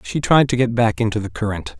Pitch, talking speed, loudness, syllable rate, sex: 115 Hz, 265 wpm, -18 LUFS, 5.9 syllables/s, male